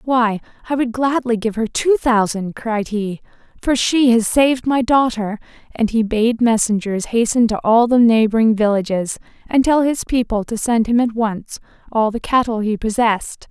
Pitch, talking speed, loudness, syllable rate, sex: 230 Hz, 180 wpm, -17 LUFS, 4.7 syllables/s, female